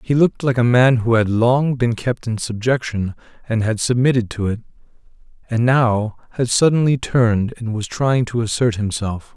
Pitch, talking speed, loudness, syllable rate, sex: 115 Hz, 180 wpm, -18 LUFS, 4.9 syllables/s, male